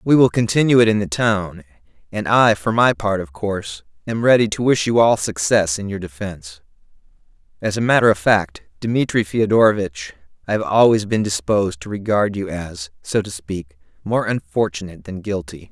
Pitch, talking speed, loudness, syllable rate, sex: 100 Hz, 175 wpm, -18 LUFS, 5.2 syllables/s, male